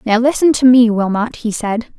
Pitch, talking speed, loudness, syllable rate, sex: 235 Hz, 210 wpm, -13 LUFS, 4.9 syllables/s, female